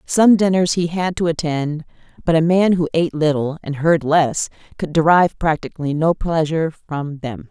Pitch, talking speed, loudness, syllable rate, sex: 160 Hz, 175 wpm, -18 LUFS, 5.1 syllables/s, female